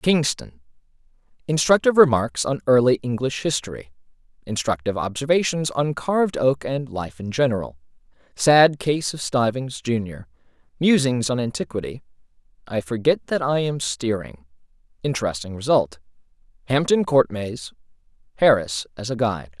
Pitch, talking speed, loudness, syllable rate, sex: 120 Hz, 95 wpm, -21 LUFS, 5.1 syllables/s, male